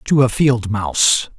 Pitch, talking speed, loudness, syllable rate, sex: 120 Hz, 175 wpm, -16 LUFS, 4.0 syllables/s, male